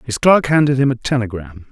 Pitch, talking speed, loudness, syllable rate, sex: 125 Hz, 210 wpm, -15 LUFS, 5.6 syllables/s, male